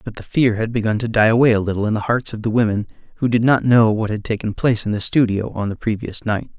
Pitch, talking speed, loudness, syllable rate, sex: 110 Hz, 285 wpm, -18 LUFS, 6.4 syllables/s, male